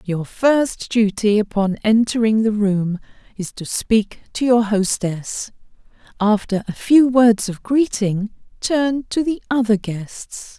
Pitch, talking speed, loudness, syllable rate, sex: 220 Hz, 135 wpm, -18 LUFS, 3.6 syllables/s, female